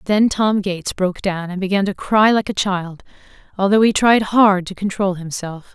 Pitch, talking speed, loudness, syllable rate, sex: 195 Hz, 200 wpm, -17 LUFS, 5.0 syllables/s, female